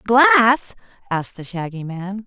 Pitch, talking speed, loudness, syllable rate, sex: 210 Hz, 135 wpm, -18 LUFS, 3.7 syllables/s, female